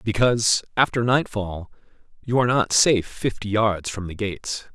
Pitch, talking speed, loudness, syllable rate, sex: 110 Hz, 150 wpm, -22 LUFS, 5.2 syllables/s, male